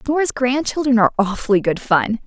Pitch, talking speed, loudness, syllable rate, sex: 240 Hz, 160 wpm, -18 LUFS, 5.9 syllables/s, female